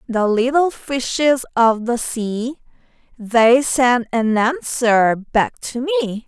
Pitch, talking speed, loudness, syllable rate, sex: 245 Hz, 125 wpm, -17 LUFS, 3.1 syllables/s, female